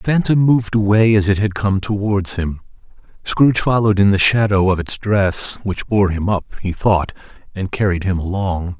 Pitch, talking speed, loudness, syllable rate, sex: 100 Hz, 190 wpm, -17 LUFS, 5.0 syllables/s, male